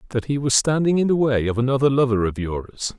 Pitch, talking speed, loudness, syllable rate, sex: 125 Hz, 240 wpm, -20 LUFS, 5.9 syllables/s, male